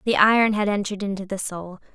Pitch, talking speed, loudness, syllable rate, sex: 200 Hz, 215 wpm, -22 LUFS, 6.4 syllables/s, female